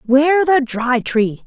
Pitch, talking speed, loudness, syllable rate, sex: 260 Hz, 165 wpm, -15 LUFS, 2.8 syllables/s, female